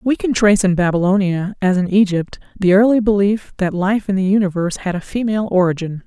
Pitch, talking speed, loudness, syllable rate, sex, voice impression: 195 Hz, 200 wpm, -16 LUFS, 5.9 syllables/s, female, feminine, adult-like, slightly relaxed, bright, soft, slightly muffled, slightly raspy, intellectual, calm, friendly, reassuring, kind